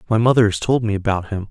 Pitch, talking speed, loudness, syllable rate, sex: 110 Hz, 280 wpm, -18 LUFS, 6.9 syllables/s, male